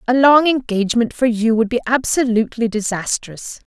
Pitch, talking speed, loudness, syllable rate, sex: 235 Hz, 145 wpm, -17 LUFS, 5.3 syllables/s, female